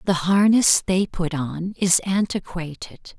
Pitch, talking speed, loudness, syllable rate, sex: 185 Hz, 130 wpm, -20 LUFS, 3.6 syllables/s, female